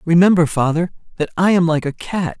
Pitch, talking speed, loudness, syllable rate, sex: 165 Hz, 200 wpm, -17 LUFS, 5.6 syllables/s, male